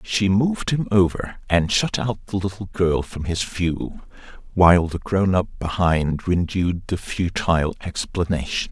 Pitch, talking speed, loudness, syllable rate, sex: 90 Hz, 150 wpm, -21 LUFS, 4.8 syllables/s, male